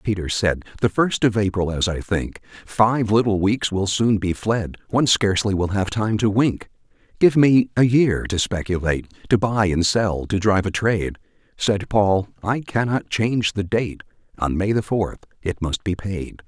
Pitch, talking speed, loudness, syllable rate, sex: 105 Hz, 185 wpm, -21 LUFS, 4.6 syllables/s, male